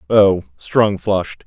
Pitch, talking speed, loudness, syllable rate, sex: 95 Hz, 125 wpm, -17 LUFS, 3.5 syllables/s, male